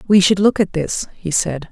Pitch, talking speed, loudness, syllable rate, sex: 185 Hz, 245 wpm, -17 LUFS, 4.8 syllables/s, female